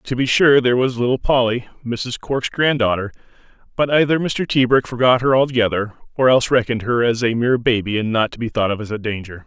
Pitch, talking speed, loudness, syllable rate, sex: 120 Hz, 215 wpm, -18 LUFS, 6.1 syllables/s, male